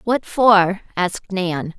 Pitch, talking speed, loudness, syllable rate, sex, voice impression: 195 Hz, 135 wpm, -18 LUFS, 4.2 syllables/s, female, very feminine, very adult-like, middle-aged, slightly thin, slightly tensed, slightly powerful, slightly bright, slightly soft, slightly clear, fluent, slightly raspy, slightly cute, intellectual, slightly refreshing, slightly sincere, calm, slightly friendly, slightly reassuring, very unique, elegant, wild, slightly sweet, lively, strict, slightly sharp, light